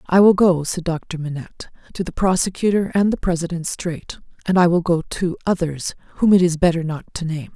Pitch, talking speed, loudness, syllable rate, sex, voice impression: 175 Hz, 205 wpm, -19 LUFS, 5.5 syllables/s, female, very feminine, middle-aged, very thin, relaxed, slightly weak, slightly dark, very soft, slightly clear, fluent, cute, very intellectual, refreshing, very sincere, calm, very friendly, reassuring, unique, very elegant, slightly wild, sweet, slightly lively, kind, slightly intense, slightly modest